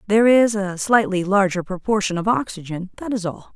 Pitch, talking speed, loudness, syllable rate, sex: 195 Hz, 185 wpm, -20 LUFS, 5.5 syllables/s, female